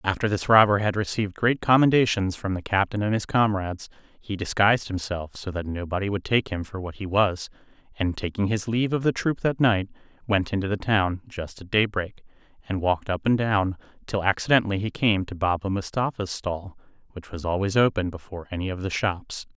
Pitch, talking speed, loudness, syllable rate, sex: 100 Hz, 195 wpm, -24 LUFS, 5.6 syllables/s, male